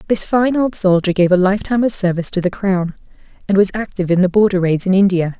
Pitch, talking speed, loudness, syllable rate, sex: 195 Hz, 245 wpm, -15 LUFS, 6.3 syllables/s, female